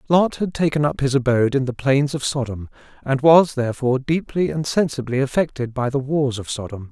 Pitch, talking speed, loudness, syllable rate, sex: 135 Hz, 200 wpm, -20 LUFS, 5.6 syllables/s, male